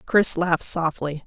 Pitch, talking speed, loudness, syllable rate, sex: 170 Hz, 140 wpm, -19 LUFS, 4.4 syllables/s, female